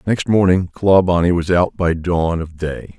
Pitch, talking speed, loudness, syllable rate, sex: 90 Hz, 180 wpm, -16 LUFS, 4.4 syllables/s, male